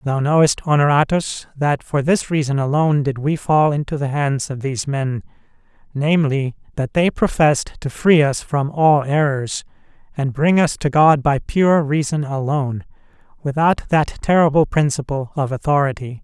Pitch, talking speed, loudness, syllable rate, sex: 145 Hz, 150 wpm, -18 LUFS, 4.8 syllables/s, male